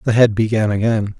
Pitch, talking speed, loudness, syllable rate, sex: 110 Hz, 200 wpm, -16 LUFS, 5.6 syllables/s, male